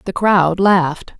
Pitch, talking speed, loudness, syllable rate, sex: 180 Hz, 150 wpm, -14 LUFS, 3.9 syllables/s, female